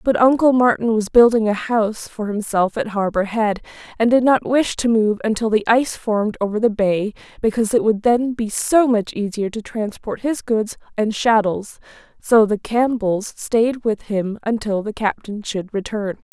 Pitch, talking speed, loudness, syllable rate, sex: 220 Hz, 185 wpm, -19 LUFS, 4.7 syllables/s, female